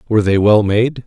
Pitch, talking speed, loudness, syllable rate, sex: 110 Hz, 225 wpm, -13 LUFS, 5.6 syllables/s, male